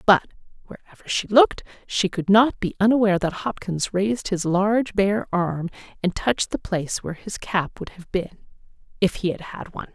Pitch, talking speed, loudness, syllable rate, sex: 195 Hz, 185 wpm, -22 LUFS, 5.4 syllables/s, female